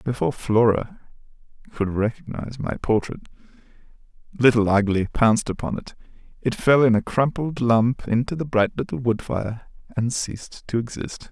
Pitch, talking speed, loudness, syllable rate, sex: 120 Hz, 145 wpm, -22 LUFS, 5.0 syllables/s, male